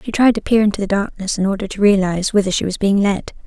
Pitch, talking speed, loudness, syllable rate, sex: 200 Hz, 275 wpm, -17 LUFS, 6.7 syllables/s, female